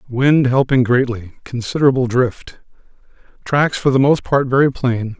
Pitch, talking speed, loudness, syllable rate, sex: 125 Hz, 140 wpm, -16 LUFS, 4.6 syllables/s, male